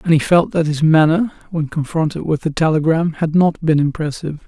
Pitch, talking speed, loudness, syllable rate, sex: 160 Hz, 200 wpm, -17 LUFS, 5.5 syllables/s, male